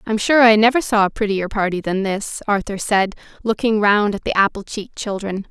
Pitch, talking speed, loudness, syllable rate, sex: 210 Hz, 205 wpm, -18 LUFS, 5.4 syllables/s, female